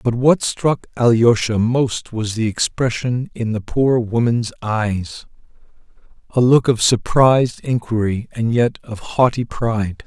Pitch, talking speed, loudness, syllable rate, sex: 115 Hz, 130 wpm, -18 LUFS, 3.9 syllables/s, male